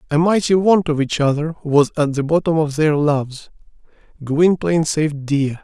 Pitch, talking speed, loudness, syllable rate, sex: 155 Hz, 170 wpm, -17 LUFS, 5.1 syllables/s, male